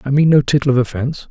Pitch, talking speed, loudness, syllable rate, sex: 135 Hz, 275 wpm, -15 LUFS, 7.4 syllables/s, male